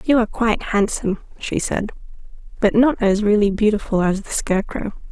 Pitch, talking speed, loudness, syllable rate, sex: 210 Hz, 165 wpm, -19 LUFS, 5.7 syllables/s, female